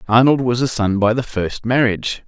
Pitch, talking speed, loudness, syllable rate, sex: 115 Hz, 210 wpm, -17 LUFS, 5.3 syllables/s, male